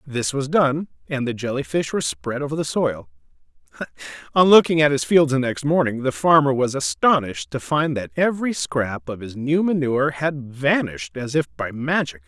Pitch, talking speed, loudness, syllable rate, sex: 135 Hz, 190 wpm, -21 LUFS, 5.2 syllables/s, male